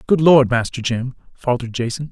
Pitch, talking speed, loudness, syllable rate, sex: 130 Hz, 170 wpm, -18 LUFS, 5.7 syllables/s, male